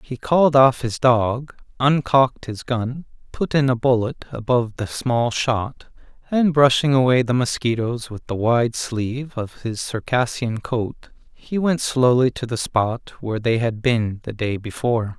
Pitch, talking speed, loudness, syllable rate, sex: 120 Hz, 165 wpm, -20 LUFS, 4.3 syllables/s, male